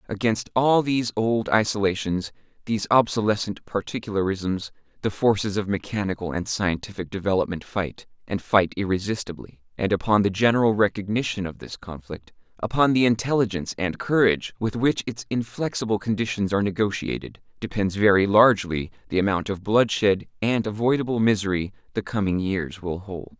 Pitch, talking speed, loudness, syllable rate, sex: 105 Hz, 140 wpm, -23 LUFS, 5.5 syllables/s, male